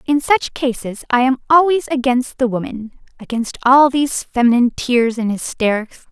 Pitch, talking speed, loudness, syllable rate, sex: 255 Hz, 155 wpm, -16 LUFS, 4.9 syllables/s, female